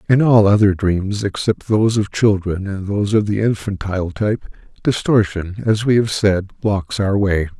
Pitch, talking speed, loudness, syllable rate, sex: 100 Hz, 175 wpm, -17 LUFS, 4.9 syllables/s, male